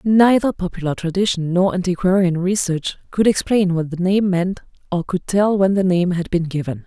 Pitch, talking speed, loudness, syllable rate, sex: 185 Hz, 185 wpm, -18 LUFS, 5.0 syllables/s, female